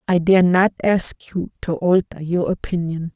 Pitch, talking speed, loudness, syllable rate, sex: 175 Hz, 170 wpm, -19 LUFS, 4.6 syllables/s, female